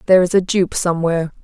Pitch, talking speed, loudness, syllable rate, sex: 175 Hz, 210 wpm, -16 LUFS, 7.4 syllables/s, female